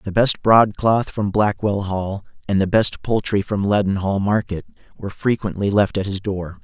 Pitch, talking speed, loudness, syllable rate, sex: 100 Hz, 170 wpm, -19 LUFS, 4.7 syllables/s, male